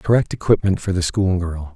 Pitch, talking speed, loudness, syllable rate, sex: 95 Hz, 170 wpm, -19 LUFS, 5.3 syllables/s, male